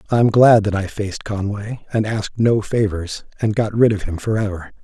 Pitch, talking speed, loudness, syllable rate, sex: 105 Hz, 210 wpm, -18 LUFS, 5.4 syllables/s, male